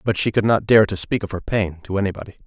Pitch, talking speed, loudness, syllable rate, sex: 100 Hz, 290 wpm, -20 LUFS, 6.6 syllables/s, male